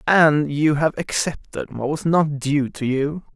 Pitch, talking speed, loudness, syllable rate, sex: 150 Hz, 180 wpm, -20 LUFS, 3.8 syllables/s, male